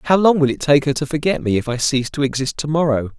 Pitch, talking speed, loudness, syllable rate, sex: 140 Hz, 300 wpm, -18 LUFS, 6.8 syllables/s, male